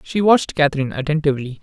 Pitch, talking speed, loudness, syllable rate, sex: 150 Hz, 145 wpm, -18 LUFS, 7.8 syllables/s, male